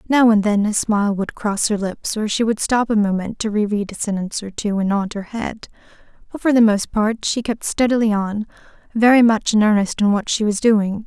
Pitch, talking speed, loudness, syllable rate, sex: 215 Hz, 235 wpm, -18 LUFS, 5.3 syllables/s, female